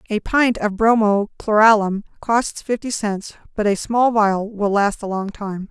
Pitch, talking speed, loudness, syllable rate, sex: 210 Hz, 180 wpm, -19 LUFS, 4.1 syllables/s, female